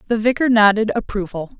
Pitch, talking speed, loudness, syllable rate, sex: 220 Hz, 150 wpm, -17 LUFS, 6.2 syllables/s, female